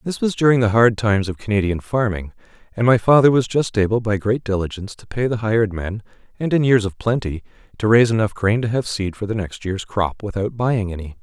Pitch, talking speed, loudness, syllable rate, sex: 110 Hz, 230 wpm, -19 LUFS, 5.9 syllables/s, male